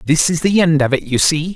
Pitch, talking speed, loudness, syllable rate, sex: 155 Hz, 310 wpm, -14 LUFS, 5.8 syllables/s, male